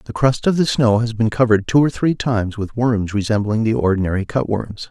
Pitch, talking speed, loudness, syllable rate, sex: 115 Hz, 230 wpm, -18 LUFS, 5.7 syllables/s, male